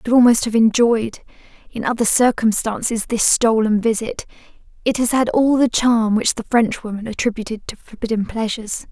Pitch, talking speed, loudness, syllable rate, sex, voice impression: 225 Hz, 155 wpm, -18 LUFS, 5.2 syllables/s, female, feminine, slightly young, slightly cute, slightly calm, friendly, slightly kind